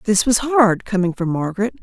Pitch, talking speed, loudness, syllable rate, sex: 210 Hz, 195 wpm, -18 LUFS, 5.6 syllables/s, female